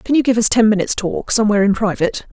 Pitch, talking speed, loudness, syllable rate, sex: 215 Hz, 250 wpm, -15 LUFS, 7.5 syllables/s, female